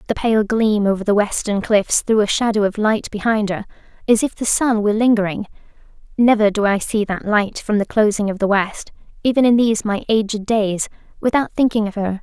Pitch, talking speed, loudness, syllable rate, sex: 210 Hz, 205 wpm, -18 LUFS, 5.5 syllables/s, female